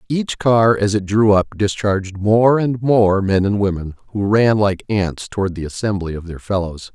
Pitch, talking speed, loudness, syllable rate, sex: 100 Hz, 200 wpm, -17 LUFS, 4.6 syllables/s, male